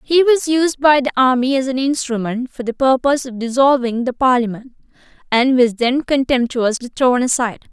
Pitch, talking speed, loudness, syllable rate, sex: 255 Hz, 170 wpm, -16 LUFS, 5.2 syllables/s, female